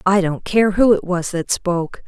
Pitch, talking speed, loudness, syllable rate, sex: 185 Hz, 230 wpm, -18 LUFS, 4.6 syllables/s, female